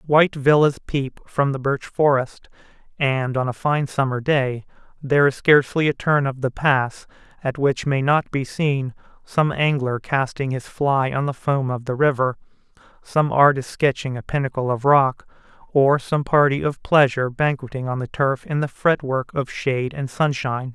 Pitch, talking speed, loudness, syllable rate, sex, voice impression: 135 Hz, 175 wpm, -20 LUFS, 4.7 syllables/s, male, masculine, adult-like, slightly muffled, slightly refreshing, slightly sincere, friendly